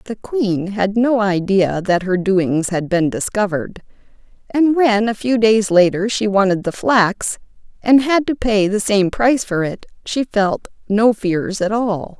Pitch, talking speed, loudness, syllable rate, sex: 205 Hz, 175 wpm, -17 LUFS, 4.1 syllables/s, female